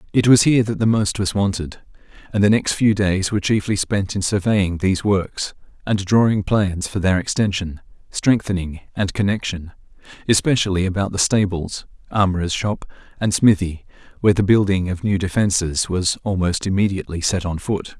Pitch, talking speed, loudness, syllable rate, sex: 100 Hz, 160 wpm, -19 LUFS, 5.3 syllables/s, male